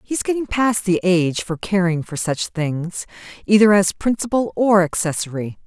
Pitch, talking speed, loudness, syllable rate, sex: 190 Hz, 160 wpm, -19 LUFS, 4.7 syllables/s, female